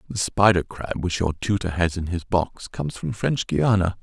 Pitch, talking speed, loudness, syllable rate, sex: 90 Hz, 210 wpm, -23 LUFS, 4.8 syllables/s, male